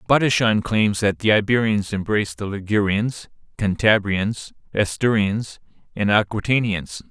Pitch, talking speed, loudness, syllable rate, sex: 105 Hz, 100 wpm, -20 LUFS, 4.5 syllables/s, male